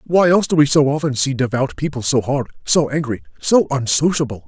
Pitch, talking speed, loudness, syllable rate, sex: 140 Hz, 200 wpm, -17 LUFS, 5.8 syllables/s, male